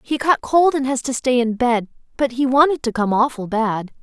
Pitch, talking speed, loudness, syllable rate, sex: 250 Hz, 240 wpm, -18 LUFS, 5.0 syllables/s, female